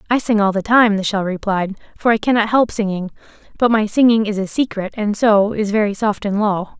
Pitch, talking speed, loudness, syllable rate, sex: 210 Hz, 230 wpm, -17 LUFS, 5.5 syllables/s, female